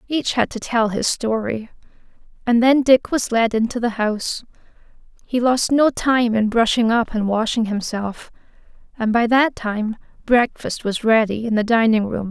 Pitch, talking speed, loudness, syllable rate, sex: 230 Hz, 170 wpm, -19 LUFS, 4.6 syllables/s, female